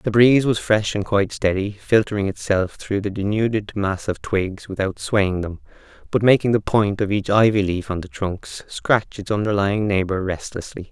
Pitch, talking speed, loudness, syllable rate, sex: 100 Hz, 185 wpm, -20 LUFS, 4.9 syllables/s, male